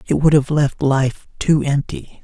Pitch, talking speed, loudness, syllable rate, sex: 140 Hz, 190 wpm, -17 LUFS, 4.1 syllables/s, male